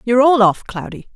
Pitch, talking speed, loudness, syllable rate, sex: 235 Hz, 205 wpm, -13 LUFS, 6.1 syllables/s, female